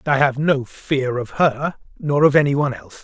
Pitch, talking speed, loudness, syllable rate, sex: 135 Hz, 220 wpm, -19 LUFS, 5.2 syllables/s, male